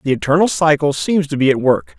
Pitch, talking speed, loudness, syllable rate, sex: 145 Hz, 240 wpm, -15 LUFS, 5.9 syllables/s, male